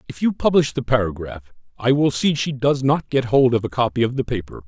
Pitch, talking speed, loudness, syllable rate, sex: 125 Hz, 245 wpm, -20 LUFS, 5.7 syllables/s, male